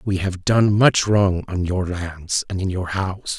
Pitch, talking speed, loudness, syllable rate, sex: 95 Hz, 215 wpm, -20 LUFS, 4.1 syllables/s, male